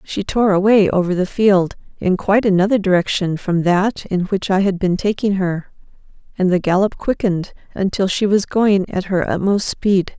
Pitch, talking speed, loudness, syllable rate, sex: 190 Hz, 185 wpm, -17 LUFS, 4.9 syllables/s, female